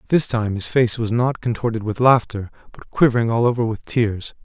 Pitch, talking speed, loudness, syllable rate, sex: 115 Hz, 205 wpm, -19 LUFS, 5.3 syllables/s, male